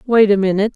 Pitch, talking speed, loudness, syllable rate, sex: 205 Hz, 240 wpm, -14 LUFS, 8.1 syllables/s, female